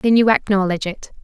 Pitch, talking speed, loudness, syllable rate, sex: 205 Hz, 195 wpm, -17 LUFS, 6.4 syllables/s, female